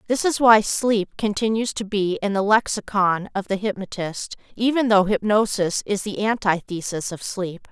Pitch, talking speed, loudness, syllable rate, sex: 205 Hz, 165 wpm, -21 LUFS, 4.6 syllables/s, female